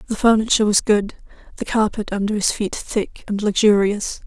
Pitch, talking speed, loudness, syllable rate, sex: 210 Hz, 170 wpm, -19 LUFS, 5.3 syllables/s, female